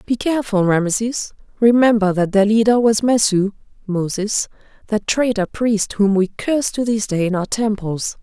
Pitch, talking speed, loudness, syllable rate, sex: 210 Hz, 160 wpm, -17 LUFS, 5.0 syllables/s, female